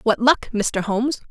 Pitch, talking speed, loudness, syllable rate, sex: 230 Hz, 185 wpm, -20 LUFS, 4.6 syllables/s, female